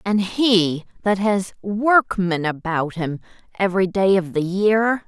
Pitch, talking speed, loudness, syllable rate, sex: 195 Hz, 140 wpm, -20 LUFS, 3.7 syllables/s, female